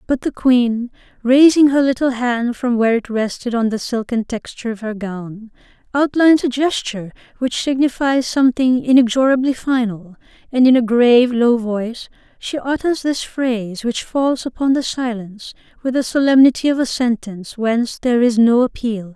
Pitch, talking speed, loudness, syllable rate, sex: 245 Hz, 165 wpm, -17 LUFS, 5.1 syllables/s, female